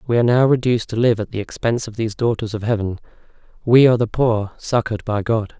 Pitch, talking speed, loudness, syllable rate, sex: 115 Hz, 225 wpm, -19 LUFS, 6.8 syllables/s, male